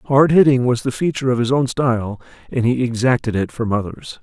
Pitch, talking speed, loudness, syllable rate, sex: 125 Hz, 215 wpm, -18 LUFS, 5.7 syllables/s, male